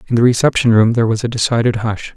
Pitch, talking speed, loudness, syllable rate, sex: 115 Hz, 250 wpm, -14 LUFS, 7.0 syllables/s, male